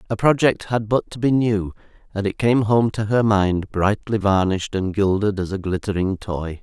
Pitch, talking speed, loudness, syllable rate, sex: 105 Hz, 200 wpm, -20 LUFS, 4.8 syllables/s, male